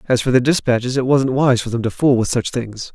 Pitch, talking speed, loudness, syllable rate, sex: 125 Hz, 285 wpm, -17 LUFS, 5.6 syllables/s, male